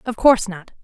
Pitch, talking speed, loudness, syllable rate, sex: 215 Hz, 215 wpm, -17 LUFS, 6.5 syllables/s, female